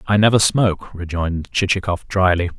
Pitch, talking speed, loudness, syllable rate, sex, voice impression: 95 Hz, 140 wpm, -18 LUFS, 5.6 syllables/s, male, masculine, middle-aged, tensed, powerful, slightly hard, slightly halting, intellectual, sincere, calm, mature, friendly, wild, lively, slightly kind, slightly sharp